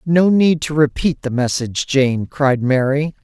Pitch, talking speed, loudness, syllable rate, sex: 140 Hz, 165 wpm, -17 LUFS, 4.2 syllables/s, male